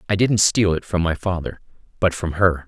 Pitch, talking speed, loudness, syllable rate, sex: 90 Hz, 225 wpm, -20 LUFS, 5.2 syllables/s, male